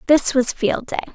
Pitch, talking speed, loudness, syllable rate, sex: 255 Hz, 210 wpm, -18 LUFS, 4.8 syllables/s, female